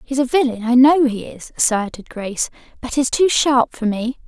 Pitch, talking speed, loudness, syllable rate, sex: 250 Hz, 210 wpm, -17 LUFS, 5.0 syllables/s, female